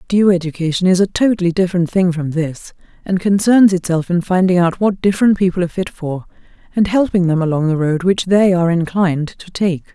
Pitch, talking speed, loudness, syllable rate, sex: 180 Hz, 200 wpm, -15 LUFS, 5.8 syllables/s, female